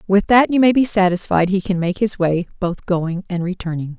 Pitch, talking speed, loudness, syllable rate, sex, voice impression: 190 Hz, 225 wpm, -18 LUFS, 5.2 syllables/s, female, feminine, middle-aged, tensed, slightly powerful, slightly hard, clear, intellectual, calm, reassuring, elegant, lively, slightly sharp